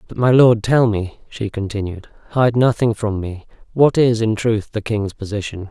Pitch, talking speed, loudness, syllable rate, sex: 110 Hz, 180 wpm, -18 LUFS, 4.7 syllables/s, male